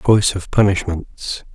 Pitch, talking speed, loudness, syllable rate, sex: 95 Hz, 115 wpm, -18 LUFS, 4.4 syllables/s, male